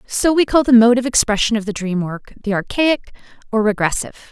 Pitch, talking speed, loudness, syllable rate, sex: 230 Hz, 210 wpm, -17 LUFS, 6.3 syllables/s, female